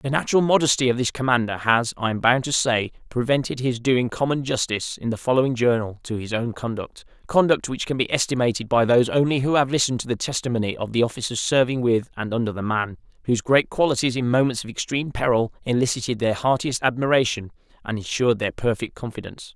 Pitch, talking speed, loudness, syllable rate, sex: 125 Hz, 195 wpm, -22 LUFS, 6.3 syllables/s, male